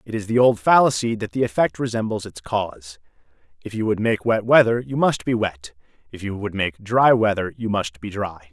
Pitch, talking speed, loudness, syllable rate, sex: 105 Hz, 220 wpm, -20 LUFS, 5.3 syllables/s, male